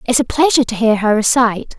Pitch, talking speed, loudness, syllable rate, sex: 235 Hz, 235 wpm, -14 LUFS, 6.5 syllables/s, female